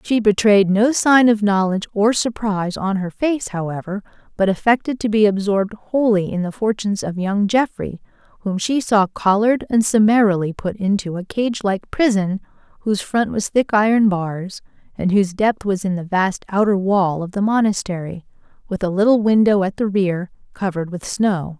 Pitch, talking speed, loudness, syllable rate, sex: 205 Hz, 180 wpm, -18 LUFS, 5.1 syllables/s, female